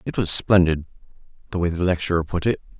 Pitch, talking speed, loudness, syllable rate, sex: 90 Hz, 195 wpm, -21 LUFS, 6.5 syllables/s, male